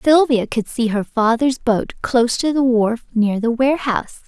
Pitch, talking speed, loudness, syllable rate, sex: 240 Hz, 185 wpm, -18 LUFS, 4.7 syllables/s, female